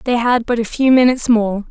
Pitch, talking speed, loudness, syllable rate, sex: 235 Hz, 245 wpm, -14 LUFS, 5.7 syllables/s, female